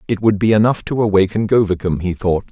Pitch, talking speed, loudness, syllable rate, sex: 100 Hz, 215 wpm, -16 LUFS, 6.1 syllables/s, male